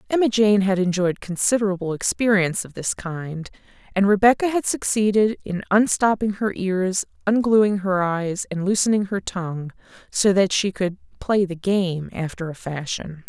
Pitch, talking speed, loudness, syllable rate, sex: 195 Hz, 155 wpm, -21 LUFS, 4.8 syllables/s, female